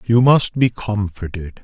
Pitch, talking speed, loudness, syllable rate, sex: 105 Hz, 145 wpm, -18 LUFS, 4.0 syllables/s, male